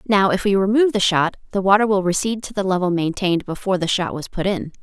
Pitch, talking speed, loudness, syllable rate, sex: 190 Hz, 250 wpm, -19 LUFS, 6.7 syllables/s, female